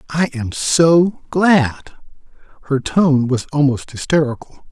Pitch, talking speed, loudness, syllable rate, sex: 145 Hz, 115 wpm, -16 LUFS, 3.8 syllables/s, male